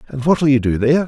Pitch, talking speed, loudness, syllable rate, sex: 140 Hz, 280 wpm, -16 LUFS, 6.6 syllables/s, male